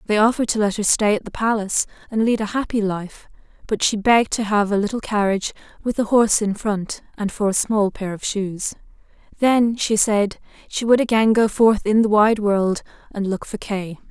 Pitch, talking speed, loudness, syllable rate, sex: 210 Hz, 215 wpm, -20 LUFS, 5.3 syllables/s, female